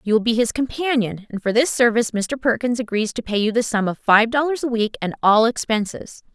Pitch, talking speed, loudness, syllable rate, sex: 230 Hz, 235 wpm, -20 LUFS, 5.7 syllables/s, female